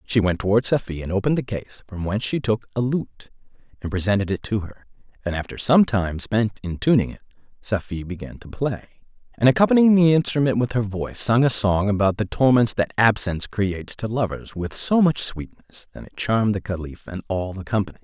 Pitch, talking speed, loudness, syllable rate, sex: 110 Hz, 205 wpm, -22 LUFS, 5.8 syllables/s, male